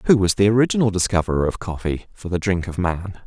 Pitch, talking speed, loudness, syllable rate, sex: 95 Hz, 220 wpm, -20 LUFS, 6.4 syllables/s, male